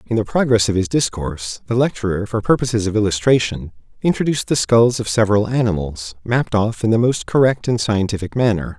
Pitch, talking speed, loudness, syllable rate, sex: 110 Hz, 185 wpm, -18 LUFS, 6.0 syllables/s, male